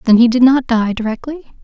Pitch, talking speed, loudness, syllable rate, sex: 245 Hz, 220 wpm, -13 LUFS, 5.5 syllables/s, female